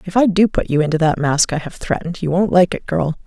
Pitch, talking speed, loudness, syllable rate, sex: 170 Hz, 295 wpm, -17 LUFS, 6.1 syllables/s, female